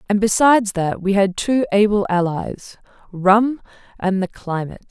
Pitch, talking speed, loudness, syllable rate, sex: 200 Hz, 135 wpm, -18 LUFS, 4.6 syllables/s, female